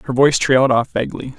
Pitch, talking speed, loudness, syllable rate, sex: 130 Hz, 215 wpm, -16 LUFS, 7.4 syllables/s, male